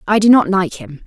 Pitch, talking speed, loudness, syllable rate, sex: 200 Hz, 285 wpm, -13 LUFS, 5.4 syllables/s, female